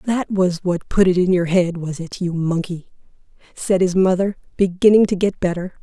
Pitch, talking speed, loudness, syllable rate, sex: 185 Hz, 195 wpm, -18 LUFS, 5.0 syllables/s, female